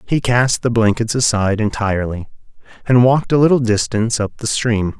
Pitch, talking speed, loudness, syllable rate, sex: 115 Hz, 170 wpm, -16 LUFS, 5.6 syllables/s, male